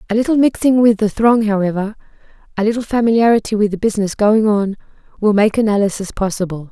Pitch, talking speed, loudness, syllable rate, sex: 210 Hz, 170 wpm, -15 LUFS, 6.4 syllables/s, female